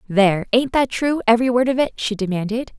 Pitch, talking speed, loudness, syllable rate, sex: 230 Hz, 195 wpm, -19 LUFS, 6.1 syllables/s, female